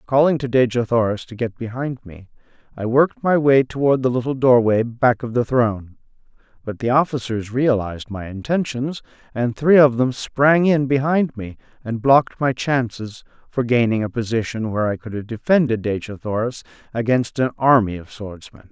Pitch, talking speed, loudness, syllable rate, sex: 120 Hz, 175 wpm, -19 LUFS, 5.1 syllables/s, male